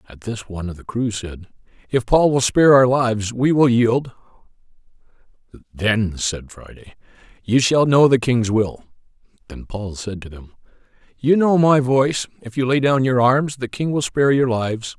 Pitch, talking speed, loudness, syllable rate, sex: 120 Hz, 185 wpm, -18 LUFS, 4.9 syllables/s, male